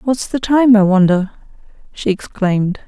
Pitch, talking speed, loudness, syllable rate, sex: 210 Hz, 145 wpm, -14 LUFS, 4.6 syllables/s, female